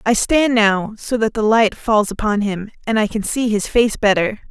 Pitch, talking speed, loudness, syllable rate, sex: 215 Hz, 225 wpm, -17 LUFS, 4.6 syllables/s, female